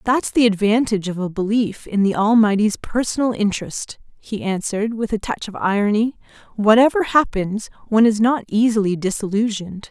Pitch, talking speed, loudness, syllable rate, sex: 215 Hz, 150 wpm, -19 LUFS, 5.4 syllables/s, female